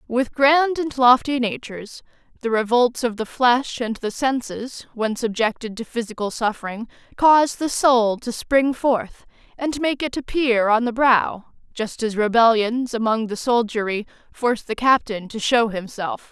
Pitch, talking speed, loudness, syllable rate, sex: 235 Hz, 160 wpm, -20 LUFS, 4.4 syllables/s, female